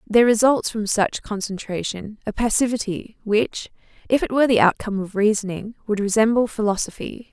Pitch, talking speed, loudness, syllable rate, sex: 215 Hz, 150 wpm, -21 LUFS, 5.5 syllables/s, female